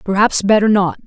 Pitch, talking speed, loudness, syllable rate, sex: 200 Hz, 170 wpm, -14 LUFS, 5.6 syllables/s, female